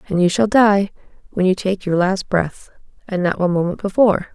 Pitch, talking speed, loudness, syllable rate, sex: 190 Hz, 205 wpm, -18 LUFS, 5.6 syllables/s, female